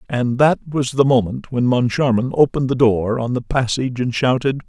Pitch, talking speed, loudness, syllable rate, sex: 125 Hz, 190 wpm, -18 LUFS, 5.2 syllables/s, male